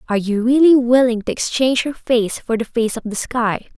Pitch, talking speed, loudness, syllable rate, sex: 235 Hz, 220 wpm, -17 LUFS, 5.4 syllables/s, female